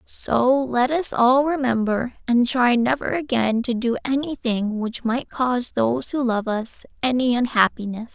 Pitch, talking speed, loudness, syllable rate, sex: 245 Hz, 155 wpm, -21 LUFS, 4.3 syllables/s, female